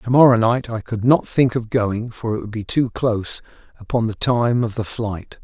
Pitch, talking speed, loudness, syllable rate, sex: 115 Hz, 230 wpm, -19 LUFS, 4.8 syllables/s, male